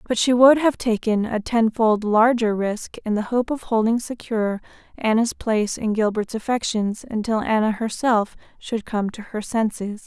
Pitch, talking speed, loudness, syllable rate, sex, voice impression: 225 Hz, 165 wpm, -21 LUFS, 4.7 syllables/s, female, very feminine, very young, very thin, slightly relaxed, slightly weak, dark, very soft, slightly muffled, fluent, slightly raspy, very cute, intellectual, very refreshing, sincere, very calm, friendly, reassuring, very unique, elegant, very sweet, very kind, slightly sharp, modest, light